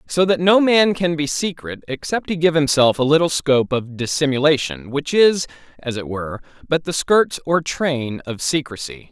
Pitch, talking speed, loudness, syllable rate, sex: 150 Hz, 185 wpm, -18 LUFS, 4.8 syllables/s, male